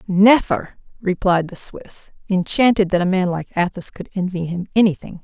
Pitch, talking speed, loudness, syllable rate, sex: 185 Hz, 160 wpm, -19 LUFS, 4.9 syllables/s, female